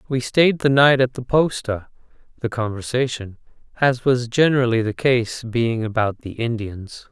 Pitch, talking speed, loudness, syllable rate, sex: 120 Hz, 150 wpm, -20 LUFS, 4.5 syllables/s, male